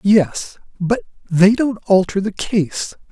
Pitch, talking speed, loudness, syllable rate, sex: 200 Hz, 135 wpm, -17 LUFS, 3.2 syllables/s, male